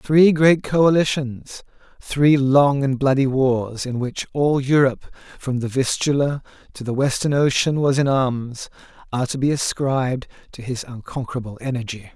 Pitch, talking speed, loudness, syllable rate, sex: 135 Hz, 150 wpm, -20 LUFS, 4.7 syllables/s, male